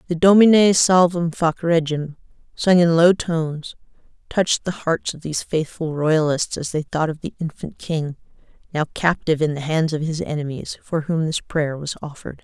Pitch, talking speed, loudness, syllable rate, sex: 160 Hz, 180 wpm, -20 LUFS, 5.0 syllables/s, female